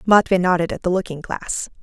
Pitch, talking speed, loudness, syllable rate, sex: 180 Hz, 195 wpm, -20 LUFS, 5.6 syllables/s, female